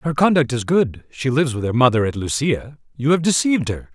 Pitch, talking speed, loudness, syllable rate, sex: 135 Hz, 230 wpm, -19 LUFS, 5.7 syllables/s, male